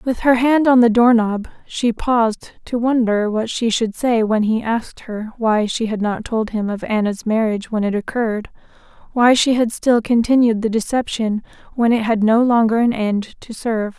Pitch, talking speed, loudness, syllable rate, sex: 225 Hz, 195 wpm, -17 LUFS, 4.8 syllables/s, female